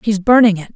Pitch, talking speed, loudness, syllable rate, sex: 205 Hz, 240 wpm, -12 LUFS, 6.2 syllables/s, female